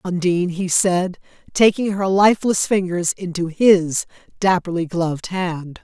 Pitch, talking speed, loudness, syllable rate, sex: 180 Hz, 125 wpm, -19 LUFS, 4.4 syllables/s, female